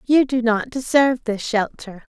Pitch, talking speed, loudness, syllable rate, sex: 240 Hz, 165 wpm, -19 LUFS, 4.6 syllables/s, female